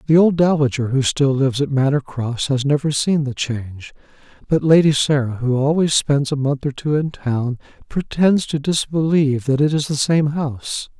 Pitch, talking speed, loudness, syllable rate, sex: 140 Hz, 190 wpm, -18 LUFS, 5.0 syllables/s, male